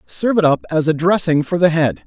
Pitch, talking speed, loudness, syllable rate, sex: 155 Hz, 260 wpm, -16 LUFS, 5.9 syllables/s, male